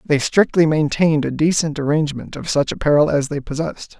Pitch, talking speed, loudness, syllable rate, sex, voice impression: 150 Hz, 180 wpm, -18 LUFS, 5.9 syllables/s, male, masculine, adult-like, slightly refreshing, sincere, slightly calm, slightly elegant